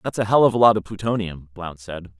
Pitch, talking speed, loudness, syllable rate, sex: 100 Hz, 275 wpm, -19 LUFS, 6.0 syllables/s, male